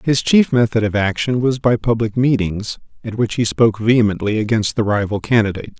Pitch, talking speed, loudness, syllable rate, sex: 115 Hz, 185 wpm, -17 LUFS, 5.7 syllables/s, male